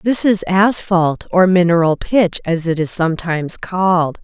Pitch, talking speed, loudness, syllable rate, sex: 175 Hz, 155 wpm, -15 LUFS, 4.5 syllables/s, female